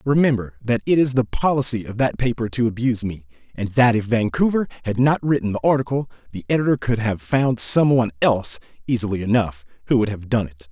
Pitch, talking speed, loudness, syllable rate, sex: 115 Hz, 200 wpm, -20 LUFS, 6.0 syllables/s, male